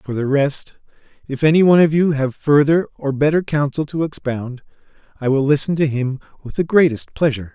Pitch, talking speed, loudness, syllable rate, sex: 145 Hz, 190 wpm, -17 LUFS, 5.6 syllables/s, male